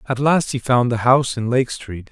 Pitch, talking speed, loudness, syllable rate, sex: 125 Hz, 255 wpm, -18 LUFS, 5.0 syllables/s, male